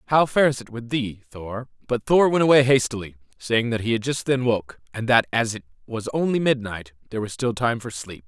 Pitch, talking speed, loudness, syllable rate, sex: 120 Hz, 225 wpm, -22 LUFS, 5.8 syllables/s, male